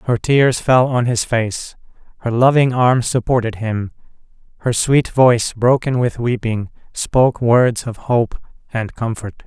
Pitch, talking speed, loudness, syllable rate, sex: 120 Hz, 145 wpm, -16 LUFS, 4.1 syllables/s, male